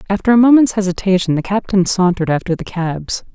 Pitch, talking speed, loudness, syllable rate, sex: 190 Hz, 180 wpm, -15 LUFS, 6.1 syllables/s, female